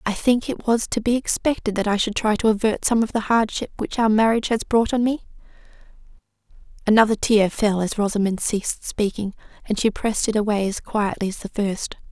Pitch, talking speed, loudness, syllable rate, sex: 215 Hz, 205 wpm, -21 LUFS, 5.7 syllables/s, female